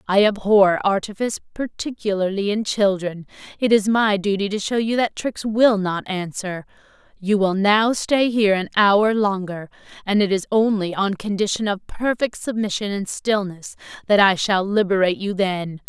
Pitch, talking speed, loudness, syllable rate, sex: 200 Hz, 160 wpm, -20 LUFS, 4.8 syllables/s, female